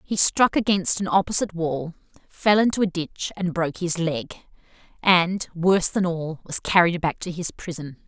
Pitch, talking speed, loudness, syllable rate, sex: 175 Hz, 180 wpm, -22 LUFS, 4.7 syllables/s, female